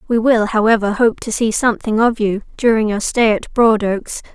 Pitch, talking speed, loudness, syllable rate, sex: 220 Hz, 195 wpm, -16 LUFS, 5.1 syllables/s, female